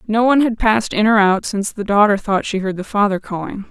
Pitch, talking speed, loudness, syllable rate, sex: 210 Hz, 260 wpm, -16 LUFS, 6.2 syllables/s, female